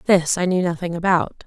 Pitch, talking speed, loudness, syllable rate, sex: 180 Hz, 205 wpm, -20 LUFS, 5.3 syllables/s, female